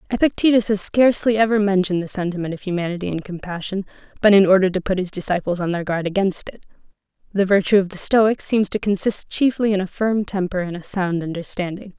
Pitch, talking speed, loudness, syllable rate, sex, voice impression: 195 Hz, 200 wpm, -20 LUFS, 6.2 syllables/s, female, very feminine, slightly young, very adult-like, thin, tensed, powerful, slightly dark, hard, very clear, very fluent, slightly cute, cool, intellectual, refreshing, very calm, friendly, reassuring, unique, very elegant, slightly wild, sweet, lively, strict, slightly intense, slightly sharp, light